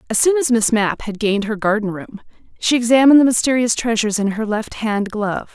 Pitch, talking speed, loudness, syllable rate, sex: 225 Hz, 215 wpm, -17 LUFS, 6.1 syllables/s, female